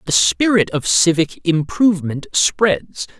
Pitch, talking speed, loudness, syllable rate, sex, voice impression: 170 Hz, 115 wpm, -16 LUFS, 3.8 syllables/s, male, masculine, adult-like, tensed, powerful, bright, clear, fluent, intellectual, friendly, wild, lively, slightly strict